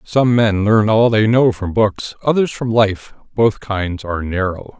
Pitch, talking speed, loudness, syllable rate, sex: 105 Hz, 190 wpm, -16 LUFS, 4.1 syllables/s, male